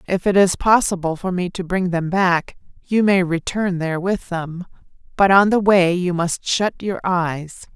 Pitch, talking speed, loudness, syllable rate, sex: 180 Hz, 195 wpm, -18 LUFS, 4.3 syllables/s, female